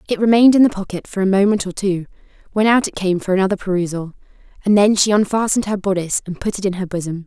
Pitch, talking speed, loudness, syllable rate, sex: 195 Hz, 240 wpm, -17 LUFS, 7.1 syllables/s, female